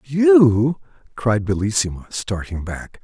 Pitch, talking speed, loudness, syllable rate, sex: 105 Hz, 100 wpm, -18 LUFS, 3.5 syllables/s, male